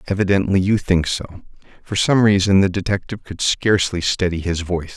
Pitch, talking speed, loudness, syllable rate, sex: 95 Hz, 170 wpm, -18 LUFS, 5.7 syllables/s, male